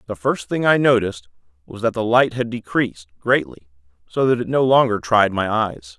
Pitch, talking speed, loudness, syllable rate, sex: 105 Hz, 200 wpm, -19 LUFS, 5.2 syllables/s, male